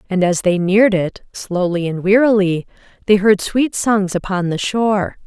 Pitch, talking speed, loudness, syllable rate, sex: 195 Hz, 170 wpm, -16 LUFS, 4.6 syllables/s, female